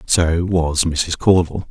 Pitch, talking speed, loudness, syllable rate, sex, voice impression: 85 Hz, 140 wpm, -17 LUFS, 3.1 syllables/s, male, very masculine, very adult-like, thick, cool, sincere, calm, slightly wild